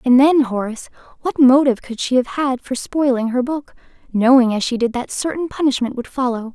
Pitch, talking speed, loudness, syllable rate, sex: 255 Hz, 200 wpm, -18 LUFS, 5.6 syllables/s, female